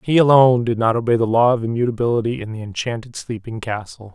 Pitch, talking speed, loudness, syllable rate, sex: 115 Hz, 205 wpm, -18 LUFS, 6.4 syllables/s, male